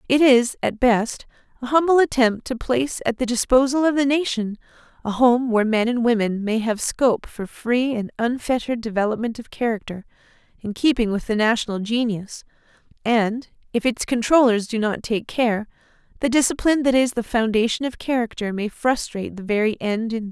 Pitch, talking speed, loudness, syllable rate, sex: 235 Hz, 175 wpm, -21 LUFS, 5.4 syllables/s, female